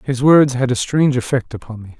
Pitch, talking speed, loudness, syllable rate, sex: 130 Hz, 240 wpm, -15 LUFS, 5.8 syllables/s, male